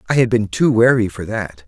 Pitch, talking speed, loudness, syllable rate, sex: 105 Hz, 250 wpm, -16 LUFS, 5.5 syllables/s, male